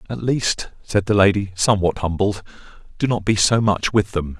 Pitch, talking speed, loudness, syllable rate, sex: 100 Hz, 190 wpm, -19 LUFS, 5.1 syllables/s, male